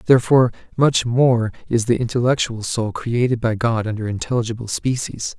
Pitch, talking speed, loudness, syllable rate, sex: 120 Hz, 145 wpm, -19 LUFS, 5.4 syllables/s, male